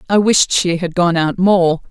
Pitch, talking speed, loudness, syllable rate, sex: 180 Hz, 220 wpm, -14 LUFS, 4.2 syllables/s, female